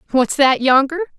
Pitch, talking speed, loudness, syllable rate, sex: 285 Hz, 150 wpm, -15 LUFS, 4.9 syllables/s, female